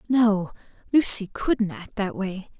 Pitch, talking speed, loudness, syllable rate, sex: 205 Hz, 140 wpm, -23 LUFS, 3.6 syllables/s, female